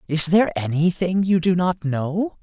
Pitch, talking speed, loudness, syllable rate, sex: 175 Hz, 175 wpm, -20 LUFS, 4.6 syllables/s, male